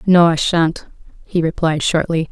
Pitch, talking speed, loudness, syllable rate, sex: 165 Hz, 155 wpm, -16 LUFS, 4.4 syllables/s, female